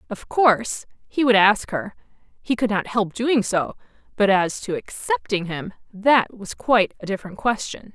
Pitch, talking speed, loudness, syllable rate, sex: 215 Hz, 160 wpm, -21 LUFS, 4.6 syllables/s, female